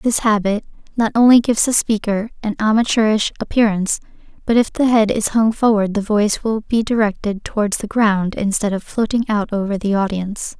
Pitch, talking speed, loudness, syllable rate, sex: 215 Hz, 180 wpm, -17 LUFS, 5.5 syllables/s, female